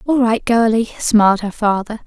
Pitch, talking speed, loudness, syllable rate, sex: 220 Hz, 175 wpm, -15 LUFS, 5.0 syllables/s, female